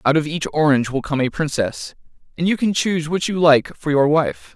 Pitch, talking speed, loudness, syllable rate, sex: 155 Hz, 235 wpm, -19 LUFS, 5.5 syllables/s, male